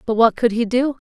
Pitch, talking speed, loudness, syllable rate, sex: 235 Hz, 280 wpm, -18 LUFS, 5.6 syllables/s, female